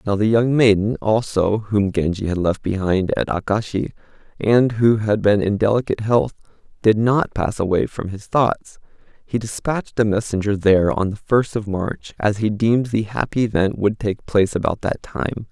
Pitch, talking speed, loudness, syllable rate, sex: 105 Hz, 185 wpm, -19 LUFS, 4.9 syllables/s, male